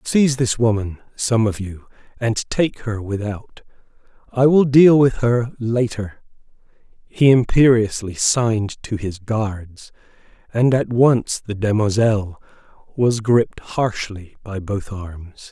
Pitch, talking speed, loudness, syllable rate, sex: 110 Hz, 130 wpm, -18 LUFS, 3.8 syllables/s, male